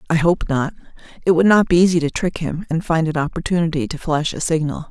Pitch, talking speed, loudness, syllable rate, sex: 165 Hz, 235 wpm, -18 LUFS, 6.3 syllables/s, female